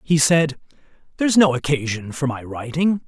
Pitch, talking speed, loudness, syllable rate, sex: 145 Hz, 155 wpm, -20 LUFS, 5.1 syllables/s, male